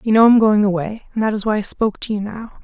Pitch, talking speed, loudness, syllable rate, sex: 210 Hz, 320 wpm, -17 LUFS, 6.8 syllables/s, female